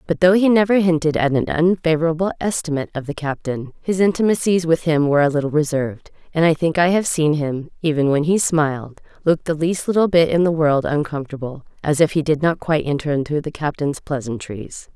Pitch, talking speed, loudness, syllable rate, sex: 155 Hz, 205 wpm, -19 LUFS, 5.8 syllables/s, female